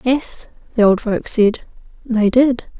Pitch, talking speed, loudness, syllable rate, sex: 230 Hz, 150 wpm, -16 LUFS, 3.5 syllables/s, female